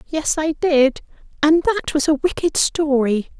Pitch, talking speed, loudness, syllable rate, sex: 300 Hz, 160 wpm, -18 LUFS, 4.3 syllables/s, female